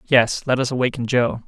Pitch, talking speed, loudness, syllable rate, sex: 125 Hz, 205 wpm, -20 LUFS, 4.8 syllables/s, male